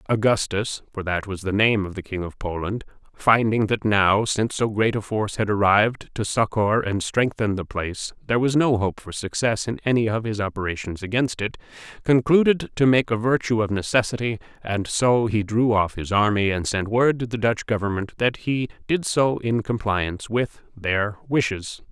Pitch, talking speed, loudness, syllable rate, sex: 110 Hz, 190 wpm, -22 LUFS, 5.0 syllables/s, male